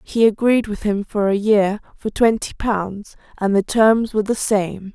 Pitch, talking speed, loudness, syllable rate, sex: 210 Hz, 195 wpm, -18 LUFS, 4.3 syllables/s, female